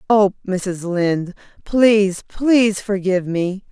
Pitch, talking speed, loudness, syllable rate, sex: 195 Hz, 115 wpm, -18 LUFS, 4.0 syllables/s, female